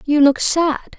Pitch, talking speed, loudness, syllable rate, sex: 300 Hz, 185 wpm, -16 LUFS, 4.3 syllables/s, female